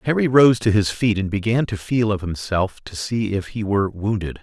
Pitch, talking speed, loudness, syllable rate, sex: 105 Hz, 230 wpm, -20 LUFS, 5.2 syllables/s, male